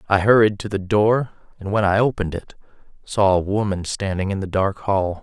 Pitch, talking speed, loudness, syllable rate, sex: 100 Hz, 205 wpm, -20 LUFS, 5.4 syllables/s, male